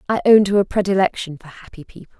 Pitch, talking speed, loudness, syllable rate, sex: 185 Hz, 220 wpm, -16 LUFS, 7.0 syllables/s, female